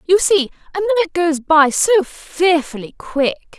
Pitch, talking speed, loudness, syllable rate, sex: 335 Hz, 150 wpm, -16 LUFS, 4.6 syllables/s, female